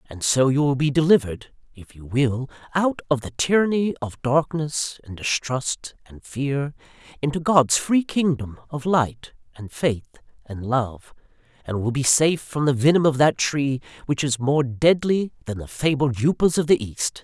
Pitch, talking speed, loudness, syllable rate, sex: 140 Hz, 175 wpm, -22 LUFS, 4.5 syllables/s, male